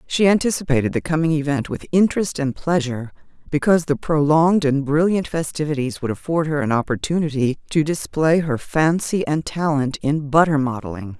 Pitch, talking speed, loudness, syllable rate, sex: 150 Hz, 155 wpm, -20 LUFS, 5.5 syllables/s, female